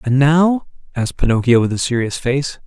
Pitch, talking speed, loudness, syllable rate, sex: 135 Hz, 180 wpm, -16 LUFS, 5.3 syllables/s, male